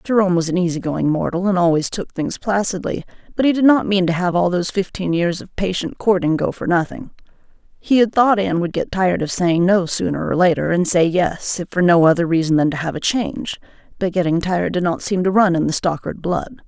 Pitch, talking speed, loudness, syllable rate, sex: 180 Hz, 235 wpm, -18 LUFS, 5.8 syllables/s, female